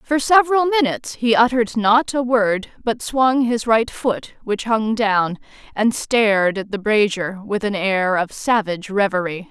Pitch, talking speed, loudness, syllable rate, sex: 220 Hz, 170 wpm, -18 LUFS, 4.4 syllables/s, female